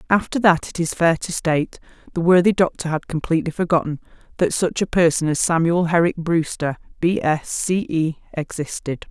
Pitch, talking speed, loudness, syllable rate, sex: 165 Hz, 170 wpm, -20 LUFS, 5.2 syllables/s, female